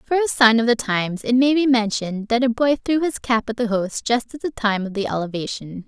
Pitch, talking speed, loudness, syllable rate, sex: 235 Hz, 265 wpm, -20 LUFS, 5.7 syllables/s, female